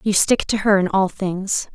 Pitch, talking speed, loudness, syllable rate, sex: 195 Hz, 240 wpm, -19 LUFS, 4.5 syllables/s, female